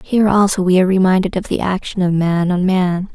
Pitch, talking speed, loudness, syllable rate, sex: 185 Hz, 230 wpm, -15 LUFS, 5.9 syllables/s, female